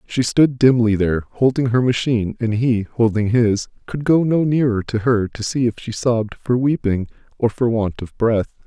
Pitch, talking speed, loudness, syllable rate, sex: 120 Hz, 200 wpm, -18 LUFS, 4.8 syllables/s, male